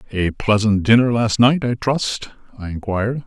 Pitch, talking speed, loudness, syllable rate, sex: 115 Hz, 165 wpm, -18 LUFS, 4.8 syllables/s, male